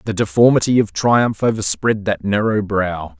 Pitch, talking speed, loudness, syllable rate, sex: 100 Hz, 150 wpm, -17 LUFS, 4.6 syllables/s, male